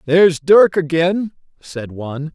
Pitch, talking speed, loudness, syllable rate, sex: 165 Hz, 130 wpm, -15 LUFS, 4.1 syllables/s, male